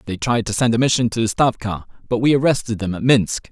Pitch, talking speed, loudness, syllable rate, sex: 115 Hz, 255 wpm, -18 LUFS, 6.1 syllables/s, male